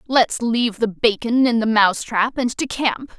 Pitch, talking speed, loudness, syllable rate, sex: 230 Hz, 170 wpm, -19 LUFS, 4.6 syllables/s, female